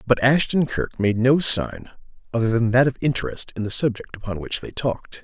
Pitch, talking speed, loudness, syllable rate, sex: 120 Hz, 205 wpm, -21 LUFS, 5.4 syllables/s, male